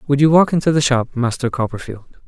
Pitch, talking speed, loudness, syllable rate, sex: 135 Hz, 210 wpm, -16 LUFS, 6.3 syllables/s, male